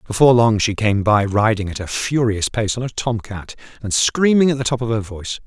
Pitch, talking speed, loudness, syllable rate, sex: 115 Hz, 240 wpm, -18 LUFS, 5.6 syllables/s, male